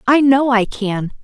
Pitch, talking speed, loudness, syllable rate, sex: 240 Hz, 195 wpm, -15 LUFS, 3.9 syllables/s, female